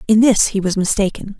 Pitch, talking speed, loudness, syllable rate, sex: 200 Hz, 215 wpm, -16 LUFS, 5.7 syllables/s, female